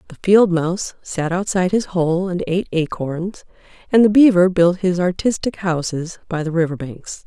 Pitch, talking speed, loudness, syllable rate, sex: 180 Hz, 175 wpm, -18 LUFS, 4.9 syllables/s, female